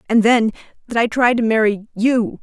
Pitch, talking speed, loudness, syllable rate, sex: 225 Hz, 150 wpm, -17 LUFS, 5.1 syllables/s, female